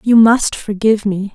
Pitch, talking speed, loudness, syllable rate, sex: 210 Hz, 180 wpm, -14 LUFS, 4.8 syllables/s, female